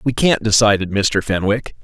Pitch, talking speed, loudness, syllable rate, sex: 110 Hz, 165 wpm, -16 LUFS, 4.8 syllables/s, male